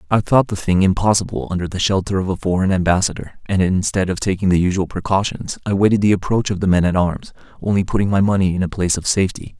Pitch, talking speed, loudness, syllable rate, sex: 95 Hz, 230 wpm, -18 LUFS, 6.6 syllables/s, male